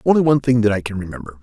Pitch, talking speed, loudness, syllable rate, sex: 110 Hz, 295 wpm, -17 LUFS, 8.4 syllables/s, male